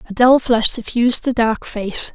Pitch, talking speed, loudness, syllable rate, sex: 230 Hz, 195 wpm, -16 LUFS, 4.6 syllables/s, female